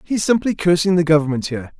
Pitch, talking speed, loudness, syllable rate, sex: 170 Hz, 200 wpm, -17 LUFS, 6.6 syllables/s, male